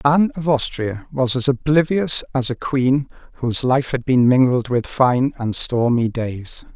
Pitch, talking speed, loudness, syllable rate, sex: 130 Hz, 170 wpm, -19 LUFS, 4.3 syllables/s, male